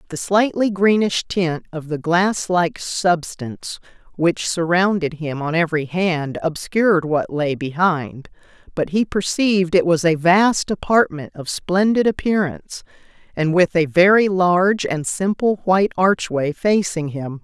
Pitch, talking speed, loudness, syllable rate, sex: 175 Hz, 140 wpm, -18 LUFS, 4.2 syllables/s, female